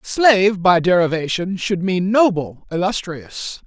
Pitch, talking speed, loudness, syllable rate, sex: 185 Hz, 115 wpm, -17 LUFS, 4.1 syllables/s, male